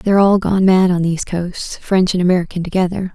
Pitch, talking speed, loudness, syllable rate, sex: 185 Hz, 190 wpm, -15 LUFS, 5.8 syllables/s, female